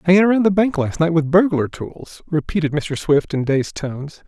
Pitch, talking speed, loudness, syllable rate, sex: 160 Hz, 210 wpm, -18 LUFS, 5.2 syllables/s, male